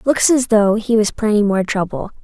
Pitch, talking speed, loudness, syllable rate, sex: 215 Hz, 215 wpm, -16 LUFS, 4.9 syllables/s, female